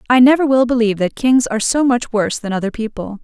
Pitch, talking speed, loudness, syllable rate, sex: 235 Hz, 240 wpm, -15 LUFS, 6.6 syllables/s, female